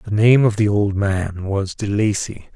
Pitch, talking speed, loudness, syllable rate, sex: 105 Hz, 210 wpm, -18 LUFS, 4.2 syllables/s, male